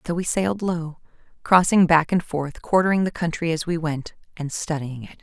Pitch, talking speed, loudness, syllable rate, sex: 165 Hz, 195 wpm, -22 LUFS, 5.2 syllables/s, female